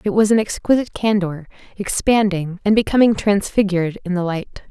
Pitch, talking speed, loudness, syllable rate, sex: 200 Hz, 155 wpm, -18 LUFS, 5.5 syllables/s, female